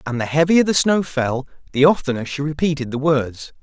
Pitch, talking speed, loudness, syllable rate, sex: 145 Hz, 200 wpm, -19 LUFS, 5.4 syllables/s, male